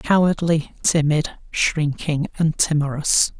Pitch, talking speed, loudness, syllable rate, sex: 155 Hz, 90 wpm, -20 LUFS, 3.6 syllables/s, male